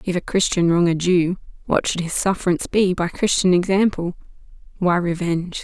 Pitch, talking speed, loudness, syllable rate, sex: 175 Hz, 160 wpm, -20 LUFS, 5.4 syllables/s, female